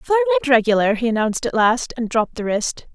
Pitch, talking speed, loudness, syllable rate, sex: 250 Hz, 225 wpm, -19 LUFS, 6.2 syllables/s, female